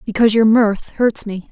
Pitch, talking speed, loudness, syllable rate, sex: 215 Hz, 200 wpm, -15 LUFS, 5.0 syllables/s, female